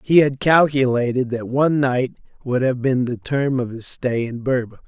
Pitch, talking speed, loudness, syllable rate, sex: 130 Hz, 195 wpm, -20 LUFS, 4.8 syllables/s, male